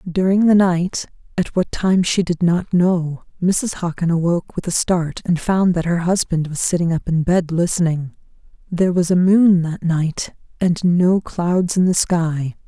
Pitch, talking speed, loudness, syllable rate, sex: 175 Hz, 185 wpm, -18 LUFS, 4.3 syllables/s, female